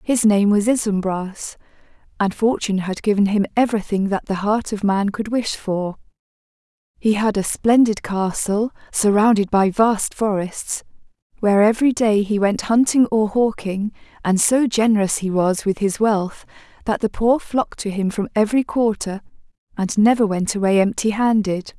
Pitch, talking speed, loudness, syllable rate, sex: 210 Hz, 160 wpm, -19 LUFS, 4.8 syllables/s, female